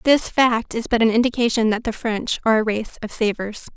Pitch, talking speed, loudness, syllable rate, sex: 225 Hz, 225 wpm, -20 LUFS, 5.6 syllables/s, female